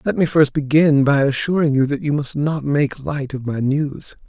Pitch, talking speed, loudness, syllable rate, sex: 145 Hz, 225 wpm, -18 LUFS, 4.7 syllables/s, male